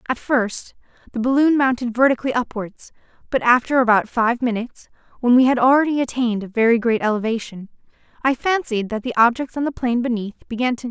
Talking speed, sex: 200 wpm, female